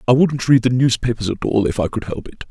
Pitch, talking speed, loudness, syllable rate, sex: 120 Hz, 285 wpm, -17 LUFS, 6.0 syllables/s, male